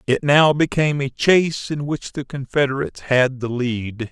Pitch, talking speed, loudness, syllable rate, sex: 135 Hz, 175 wpm, -19 LUFS, 4.8 syllables/s, male